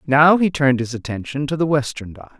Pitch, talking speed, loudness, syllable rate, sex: 140 Hz, 225 wpm, -18 LUFS, 5.8 syllables/s, male